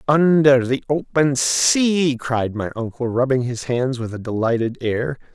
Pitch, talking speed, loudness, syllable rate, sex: 130 Hz, 155 wpm, -19 LUFS, 4.0 syllables/s, male